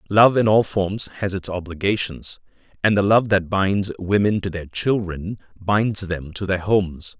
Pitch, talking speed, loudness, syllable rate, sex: 95 Hz, 175 wpm, -21 LUFS, 4.3 syllables/s, male